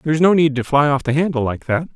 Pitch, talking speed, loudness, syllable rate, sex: 145 Hz, 305 wpm, -17 LUFS, 6.6 syllables/s, male